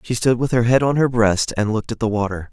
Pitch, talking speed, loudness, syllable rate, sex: 115 Hz, 310 wpm, -18 LUFS, 6.2 syllables/s, male